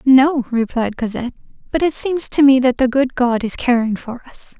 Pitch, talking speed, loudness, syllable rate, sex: 250 Hz, 210 wpm, -17 LUFS, 5.0 syllables/s, female